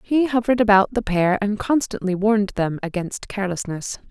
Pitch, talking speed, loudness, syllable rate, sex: 205 Hz, 160 wpm, -21 LUFS, 5.5 syllables/s, female